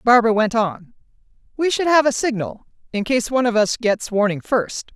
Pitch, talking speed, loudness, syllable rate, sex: 230 Hz, 195 wpm, -19 LUFS, 5.3 syllables/s, female